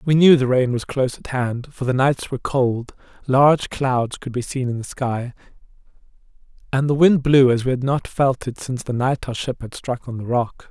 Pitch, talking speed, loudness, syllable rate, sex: 130 Hz, 230 wpm, -20 LUFS, 5.1 syllables/s, male